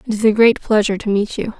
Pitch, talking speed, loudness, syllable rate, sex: 215 Hz, 300 wpm, -16 LUFS, 6.9 syllables/s, female